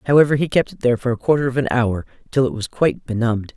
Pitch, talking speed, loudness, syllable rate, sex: 125 Hz, 270 wpm, -19 LUFS, 7.4 syllables/s, female